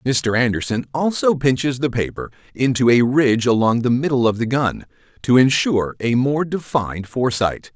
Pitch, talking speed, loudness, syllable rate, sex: 125 Hz, 160 wpm, -18 LUFS, 5.2 syllables/s, male